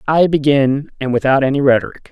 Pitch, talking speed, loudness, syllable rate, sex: 140 Hz, 170 wpm, -15 LUFS, 5.8 syllables/s, male